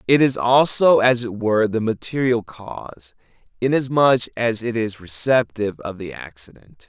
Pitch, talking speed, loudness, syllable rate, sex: 115 Hz, 150 wpm, -19 LUFS, 4.7 syllables/s, male